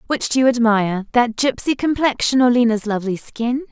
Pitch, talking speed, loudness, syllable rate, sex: 240 Hz, 160 wpm, -18 LUFS, 5.6 syllables/s, female